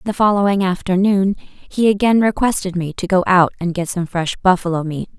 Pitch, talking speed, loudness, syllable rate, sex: 185 Hz, 185 wpm, -17 LUFS, 5.2 syllables/s, female